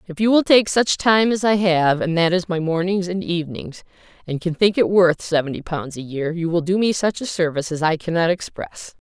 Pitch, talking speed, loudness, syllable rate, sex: 175 Hz, 240 wpm, -19 LUFS, 5.3 syllables/s, female